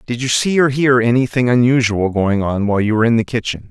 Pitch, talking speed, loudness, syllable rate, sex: 120 Hz, 245 wpm, -15 LUFS, 6.2 syllables/s, male